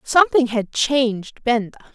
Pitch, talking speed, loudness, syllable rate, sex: 240 Hz, 125 wpm, -19 LUFS, 4.7 syllables/s, female